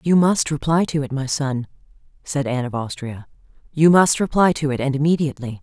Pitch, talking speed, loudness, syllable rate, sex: 145 Hz, 190 wpm, -19 LUFS, 5.7 syllables/s, female